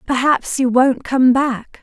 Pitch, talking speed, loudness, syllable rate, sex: 260 Hz, 165 wpm, -16 LUFS, 3.6 syllables/s, female